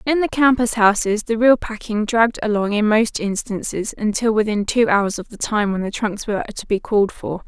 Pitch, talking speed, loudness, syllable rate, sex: 215 Hz, 215 wpm, -19 LUFS, 5.3 syllables/s, female